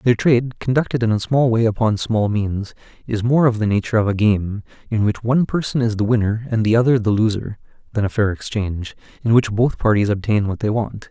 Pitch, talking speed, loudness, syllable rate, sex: 110 Hz, 225 wpm, -19 LUFS, 5.8 syllables/s, male